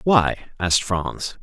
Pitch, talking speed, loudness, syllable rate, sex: 105 Hz, 125 wpm, -21 LUFS, 3.2 syllables/s, male